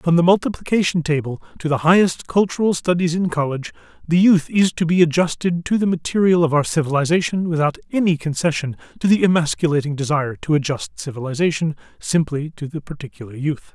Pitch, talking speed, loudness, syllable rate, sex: 160 Hz, 165 wpm, -19 LUFS, 6.1 syllables/s, male